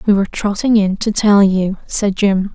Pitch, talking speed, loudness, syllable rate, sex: 200 Hz, 210 wpm, -15 LUFS, 4.7 syllables/s, female